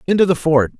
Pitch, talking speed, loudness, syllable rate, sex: 160 Hz, 225 wpm, -15 LUFS, 6.7 syllables/s, male